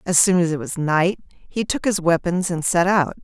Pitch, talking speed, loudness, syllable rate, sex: 175 Hz, 240 wpm, -20 LUFS, 4.9 syllables/s, female